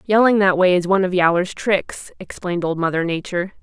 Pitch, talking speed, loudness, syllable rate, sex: 185 Hz, 200 wpm, -18 LUFS, 5.9 syllables/s, female